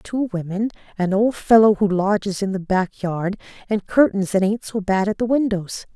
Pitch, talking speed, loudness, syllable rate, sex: 205 Hz, 200 wpm, -20 LUFS, 4.7 syllables/s, female